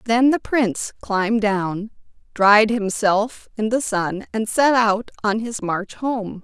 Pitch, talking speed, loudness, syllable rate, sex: 215 Hz, 160 wpm, -20 LUFS, 3.6 syllables/s, female